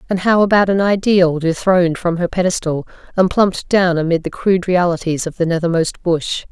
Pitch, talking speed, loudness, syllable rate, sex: 175 Hz, 185 wpm, -16 LUFS, 5.5 syllables/s, female